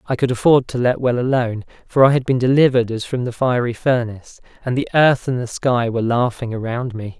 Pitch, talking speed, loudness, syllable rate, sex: 125 Hz, 225 wpm, -18 LUFS, 6.0 syllables/s, male